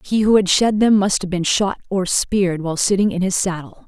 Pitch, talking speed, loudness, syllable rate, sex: 190 Hz, 245 wpm, -17 LUFS, 5.5 syllables/s, female